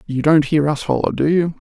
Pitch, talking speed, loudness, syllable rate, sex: 150 Hz, 250 wpm, -17 LUFS, 5.4 syllables/s, male